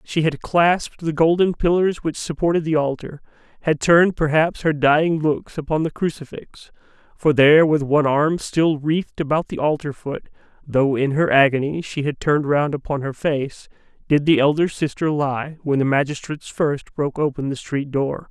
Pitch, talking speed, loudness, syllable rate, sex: 150 Hz, 175 wpm, -19 LUFS, 5.1 syllables/s, male